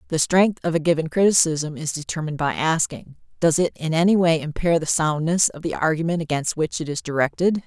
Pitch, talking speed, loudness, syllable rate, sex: 160 Hz, 205 wpm, -21 LUFS, 5.7 syllables/s, female